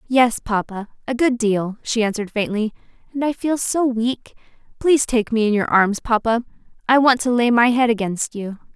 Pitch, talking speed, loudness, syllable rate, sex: 230 Hz, 190 wpm, -19 LUFS, 5.0 syllables/s, female